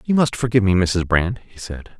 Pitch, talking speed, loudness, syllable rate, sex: 105 Hz, 240 wpm, -18 LUFS, 5.6 syllables/s, male